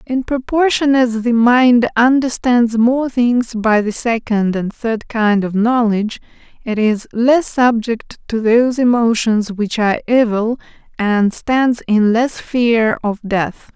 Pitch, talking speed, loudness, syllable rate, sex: 230 Hz, 145 wpm, -15 LUFS, 3.7 syllables/s, female